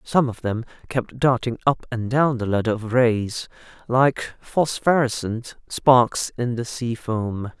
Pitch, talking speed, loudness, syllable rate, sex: 120 Hz, 150 wpm, -22 LUFS, 3.7 syllables/s, male